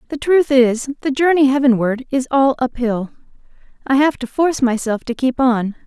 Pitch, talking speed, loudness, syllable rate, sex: 260 Hz, 185 wpm, -16 LUFS, 5.0 syllables/s, female